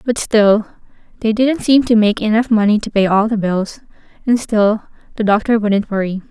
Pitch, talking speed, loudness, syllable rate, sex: 215 Hz, 180 wpm, -15 LUFS, 4.9 syllables/s, female